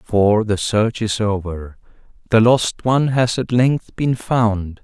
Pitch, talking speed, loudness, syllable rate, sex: 110 Hz, 160 wpm, -17 LUFS, 3.6 syllables/s, male